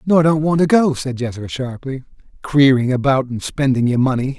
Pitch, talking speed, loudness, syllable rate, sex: 135 Hz, 190 wpm, -17 LUFS, 5.4 syllables/s, male